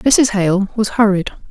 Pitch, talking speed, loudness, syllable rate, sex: 205 Hz, 160 wpm, -15 LUFS, 4.1 syllables/s, female